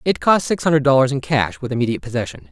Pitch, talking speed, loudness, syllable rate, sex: 130 Hz, 240 wpm, -18 LUFS, 7.1 syllables/s, male